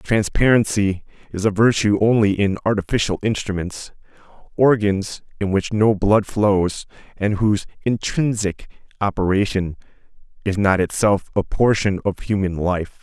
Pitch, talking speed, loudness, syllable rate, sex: 100 Hz, 120 wpm, -19 LUFS, 4.5 syllables/s, male